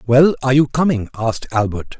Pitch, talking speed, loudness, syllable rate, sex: 125 Hz, 180 wpm, -17 LUFS, 6.0 syllables/s, male